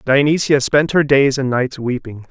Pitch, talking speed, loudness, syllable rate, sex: 135 Hz, 180 wpm, -16 LUFS, 4.6 syllables/s, male